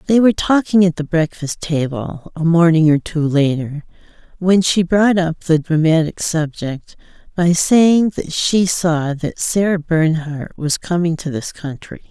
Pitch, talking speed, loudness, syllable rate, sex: 165 Hz, 160 wpm, -16 LUFS, 4.1 syllables/s, female